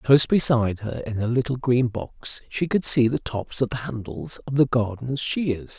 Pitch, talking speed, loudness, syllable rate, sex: 125 Hz, 205 wpm, -23 LUFS, 4.9 syllables/s, male